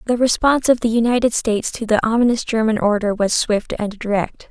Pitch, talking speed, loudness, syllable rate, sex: 225 Hz, 200 wpm, -18 LUFS, 5.8 syllables/s, female